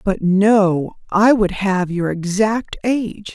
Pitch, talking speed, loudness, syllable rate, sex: 200 Hz, 145 wpm, -17 LUFS, 3.3 syllables/s, female